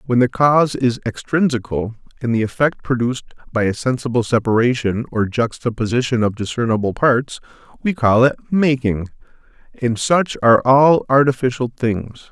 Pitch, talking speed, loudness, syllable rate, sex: 125 Hz, 140 wpm, -17 LUFS, 5.2 syllables/s, male